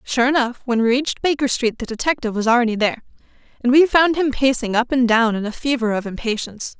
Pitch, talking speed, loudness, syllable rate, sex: 245 Hz, 220 wpm, -18 LUFS, 6.4 syllables/s, female